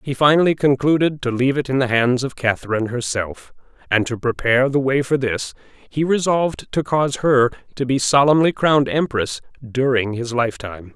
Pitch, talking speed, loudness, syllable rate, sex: 130 Hz, 175 wpm, -19 LUFS, 5.6 syllables/s, male